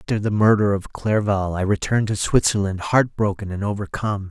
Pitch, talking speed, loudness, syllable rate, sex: 100 Hz, 180 wpm, -21 LUFS, 5.6 syllables/s, male